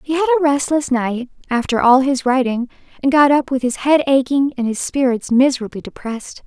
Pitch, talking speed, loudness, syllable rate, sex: 265 Hz, 195 wpm, -17 LUFS, 5.6 syllables/s, female